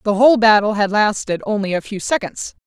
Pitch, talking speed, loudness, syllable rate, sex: 210 Hz, 200 wpm, -16 LUFS, 5.7 syllables/s, female